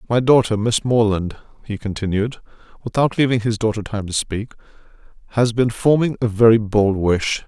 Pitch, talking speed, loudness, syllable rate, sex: 110 Hz, 160 wpm, -18 LUFS, 5.0 syllables/s, male